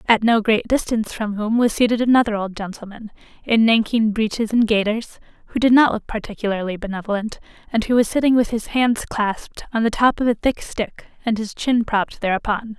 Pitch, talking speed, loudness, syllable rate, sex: 220 Hz, 195 wpm, -19 LUFS, 5.7 syllables/s, female